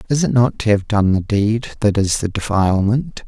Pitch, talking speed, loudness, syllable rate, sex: 110 Hz, 220 wpm, -17 LUFS, 5.1 syllables/s, male